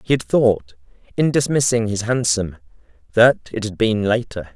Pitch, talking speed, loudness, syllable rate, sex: 110 Hz, 160 wpm, -18 LUFS, 4.7 syllables/s, male